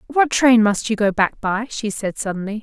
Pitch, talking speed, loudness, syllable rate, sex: 220 Hz, 230 wpm, -18 LUFS, 5.0 syllables/s, female